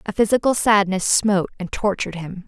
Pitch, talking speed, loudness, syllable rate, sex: 200 Hz, 170 wpm, -19 LUFS, 5.8 syllables/s, female